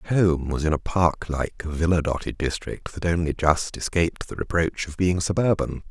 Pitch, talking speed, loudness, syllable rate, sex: 85 Hz, 195 wpm, -24 LUFS, 5.0 syllables/s, male